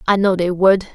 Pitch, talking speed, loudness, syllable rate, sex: 185 Hz, 255 wpm, -16 LUFS, 5.3 syllables/s, female